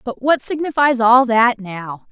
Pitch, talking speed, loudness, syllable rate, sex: 240 Hz, 170 wpm, -15 LUFS, 4.0 syllables/s, female